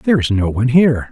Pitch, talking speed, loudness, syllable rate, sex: 125 Hz, 270 wpm, -14 LUFS, 7.5 syllables/s, male